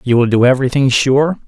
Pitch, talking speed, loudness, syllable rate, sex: 130 Hz, 205 wpm, -13 LUFS, 6.1 syllables/s, male